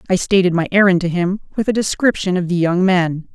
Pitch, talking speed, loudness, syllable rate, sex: 185 Hz, 235 wpm, -16 LUFS, 5.8 syllables/s, female